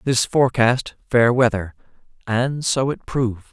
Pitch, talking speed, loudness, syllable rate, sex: 120 Hz, 135 wpm, -19 LUFS, 4.4 syllables/s, male